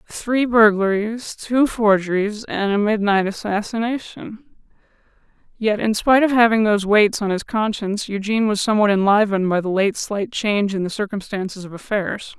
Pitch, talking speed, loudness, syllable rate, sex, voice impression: 210 Hz, 155 wpm, -19 LUFS, 5.3 syllables/s, female, very feminine, slightly adult-like, thin, tensed, powerful, slightly dark, slightly hard, clear, fluent, cute, slightly cool, intellectual, refreshing, very sincere, calm, friendly, slightly reassuring, very unique, slightly elegant, wild, slightly sweet, lively, strict, slightly intense